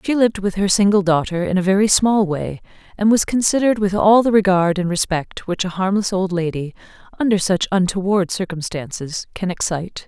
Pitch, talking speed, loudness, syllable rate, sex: 190 Hz, 185 wpm, -18 LUFS, 5.5 syllables/s, female